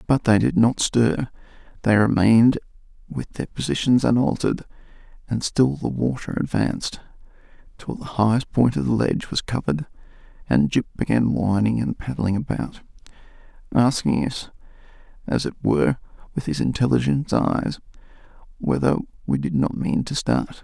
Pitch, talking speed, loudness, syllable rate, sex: 125 Hz, 140 wpm, -22 LUFS, 5.1 syllables/s, male